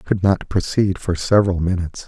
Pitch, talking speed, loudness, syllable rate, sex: 95 Hz, 205 wpm, -19 LUFS, 6.4 syllables/s, male